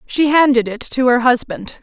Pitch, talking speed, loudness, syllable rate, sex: 255 Hz, 195 wpm, -15 LUFS, 4.8 syllables/s, female